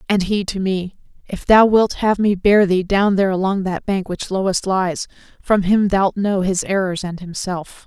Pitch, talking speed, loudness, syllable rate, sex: 190 Hz, 205 wpm, -18 LUFS, 4.5 syllables/s, female